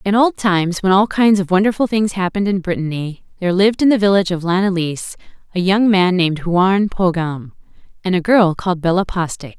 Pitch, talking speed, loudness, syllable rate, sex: 185 Hz, 195 wpm, -16 LUFS, 5.9 syllables/s, female